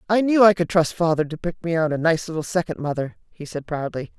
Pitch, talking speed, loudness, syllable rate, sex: 165 Hz, 260 wpm, -21 LUFS, 6.0 syllables/s, female